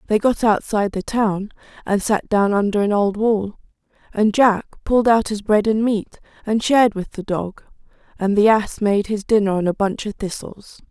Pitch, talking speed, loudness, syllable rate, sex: 210 Hz, 200 wpm, -19 LUFS, 4.9 syllables/s, female